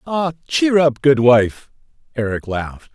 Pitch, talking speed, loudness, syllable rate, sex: 135 Hz, 145 wpm, -17 LUFS, 4.1 syllables/s, male